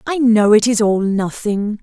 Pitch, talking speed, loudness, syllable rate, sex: 220 Hz, 195 wpm, -15 LUFS, 4.2 syllables/s, female